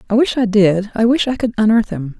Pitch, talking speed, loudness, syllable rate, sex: 220 Hz, 275 wpm, -15 LUFS, 5.7 syllables/s, female